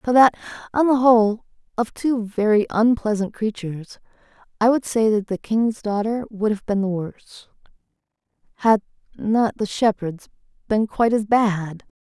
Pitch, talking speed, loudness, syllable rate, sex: 215 Hz, 150 wpm, -20 LUFS, 4.7 syllables/s, female